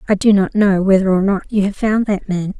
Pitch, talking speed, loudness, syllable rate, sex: 195 Hz, 275 wpm, -15 LUFS, 5.4 syllables/s, female